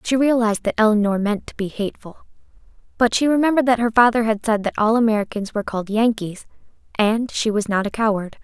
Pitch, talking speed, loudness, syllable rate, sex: 220 Hz, 200 wpm, -19 LUFS, 6.4 syllables/s, female